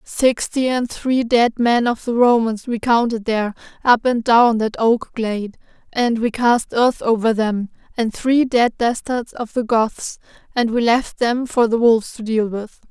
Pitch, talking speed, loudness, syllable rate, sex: 230 Hz, 185 wpm, -18 LUFS, 4.2 syllables/s, female